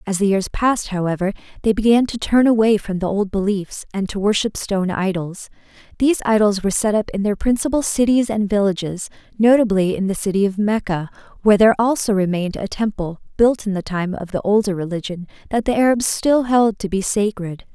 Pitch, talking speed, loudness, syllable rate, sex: 205 Hz, 195 wpm, -18 LUFS, 5.8 syllables/s, female